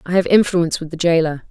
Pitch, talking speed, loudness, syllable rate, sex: 170 Hz, 240 wpm, -17 LUFS, 6.5 syllables/s, female